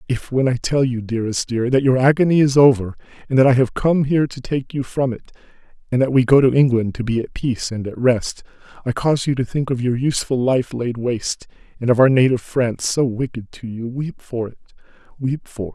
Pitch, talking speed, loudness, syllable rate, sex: 125 Hz, 235 wpm, -19 LUFS, 6.0 syllables/s, male